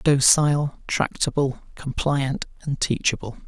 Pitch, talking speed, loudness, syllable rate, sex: 135 Hz, 85 wpm, -22 LUFS, 4.1 syllables/s, male